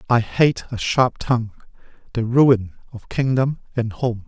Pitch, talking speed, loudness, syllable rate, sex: 120 Hz, 155 wpm, -20 LUFS, 4.2 syllables/s, male